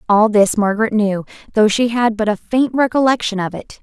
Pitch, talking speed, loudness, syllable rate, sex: 220 Hz, 205 wpm, -16 LUFS, 5.4 syllables/s, female